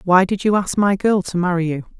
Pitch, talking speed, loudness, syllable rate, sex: 185 Hz, 270 wpm, -18 LUFS, 5.5 syllables/s, female